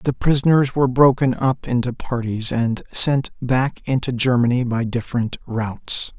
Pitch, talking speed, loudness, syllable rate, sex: 125 Hz, 145 wpm, -20 LUFS, 4.6 syllables/s, male